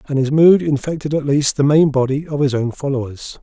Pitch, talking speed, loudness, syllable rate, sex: 140 Hz, 230 wpm, -16 LUFS, 5.5 syllables/s, male